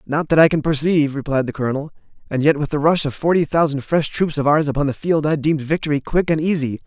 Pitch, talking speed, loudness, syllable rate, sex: 150 Hz, 255 wpm, -18 LUFS, 6.5 syllables/s, male